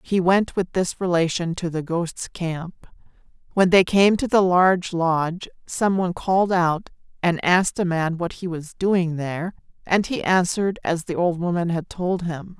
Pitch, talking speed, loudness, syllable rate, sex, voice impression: 175 Hz, 185 wpm, -21 LUFS, 4.6 syllables/s, female, feminine, adult-like, tensed, slightly powerful, bright, clear, fluent, intellectual, calm, reassuring, elegant, lively, slightly sharp